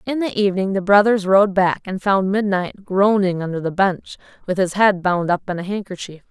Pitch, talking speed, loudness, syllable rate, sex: 190 Hz, 210 wpm, -18 LUFS, 5.2 syllables/s, female